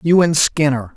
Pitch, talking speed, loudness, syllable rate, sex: 150 Hz, 190 wpm, -15 LUFS, 4.7 syllables/s, male